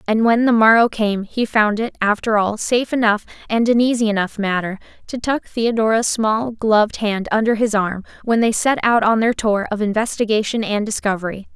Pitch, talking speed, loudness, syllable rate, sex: 220 Hz, 190 wpm, -18 LUFS, 5.2 syllables/s, female